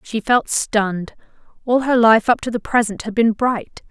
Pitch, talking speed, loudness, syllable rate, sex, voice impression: 225 Hz, 200 wpm, -17 LUFS, 4.6 syllables/s, female, feminine, adult-like, tensed, powerful, slightly bright, clear, slightly muffled, intellectual, friendly, reassuring, lively